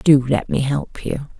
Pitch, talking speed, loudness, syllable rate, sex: 140 Hz, 215 wpm, -20 LUFS, 3.9 syllables/s, female